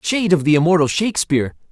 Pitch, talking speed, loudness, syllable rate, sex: 165 Hz, 175 wpm, -17 LUFS, 7.4 syllables/s, male